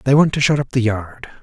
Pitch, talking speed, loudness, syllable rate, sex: 125 Hz, 295 wpm, -17 LUFS, 5.9 syllables/s, male